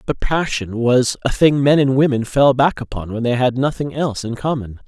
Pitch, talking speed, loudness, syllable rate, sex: 130 Hz, 220 wpm, -17 LUFS, 5.2 syllables/s, male